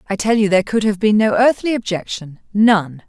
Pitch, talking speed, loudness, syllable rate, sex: 205 Hz, 195 wpm, -16 LUFS, 5.5 syllables/s, female